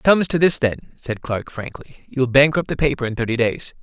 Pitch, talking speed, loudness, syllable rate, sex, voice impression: 135 Hz, 250 wpm, -19 LUFS, 6.0 syllables/s, male, masculine, adult-like, tensed, powerful, bright, clear, fluent, cool, intellectual, friendly, wild, lively, sharp